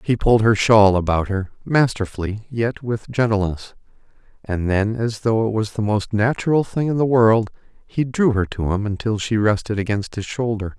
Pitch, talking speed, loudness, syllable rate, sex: 110 Hz, 190 wpm, -20 LUFS, 5.0 syllables/s, male